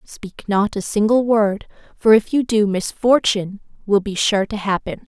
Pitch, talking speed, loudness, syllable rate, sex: 210 Hz, 175 wpm, -18 LUFS, 4.5 syllables/s, female